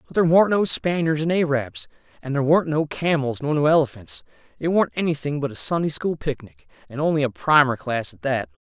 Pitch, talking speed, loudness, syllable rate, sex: 145 Hz, 215 wpm, -21 LUFS, 5.7 syllables/s, male